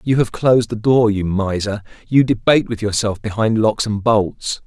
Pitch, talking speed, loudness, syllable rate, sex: 110 Hz, 195 wpm, -17 LUFS, 4.9 syllables/s, male